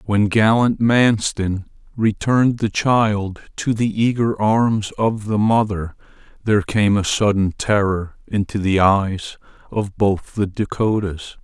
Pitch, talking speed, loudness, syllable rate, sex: 105 Hz, 130 wpm, -19 LUFS, 3.8 syllables/s, male